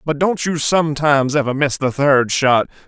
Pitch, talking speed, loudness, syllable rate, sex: 145 Hz, 190 wpm, -16 LUFS, 5.0 syllables/s, male